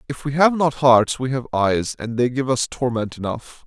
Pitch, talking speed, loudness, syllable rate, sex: 125 Hz, 230 wpm, -20 LUFS, 4.7 syllables/s, male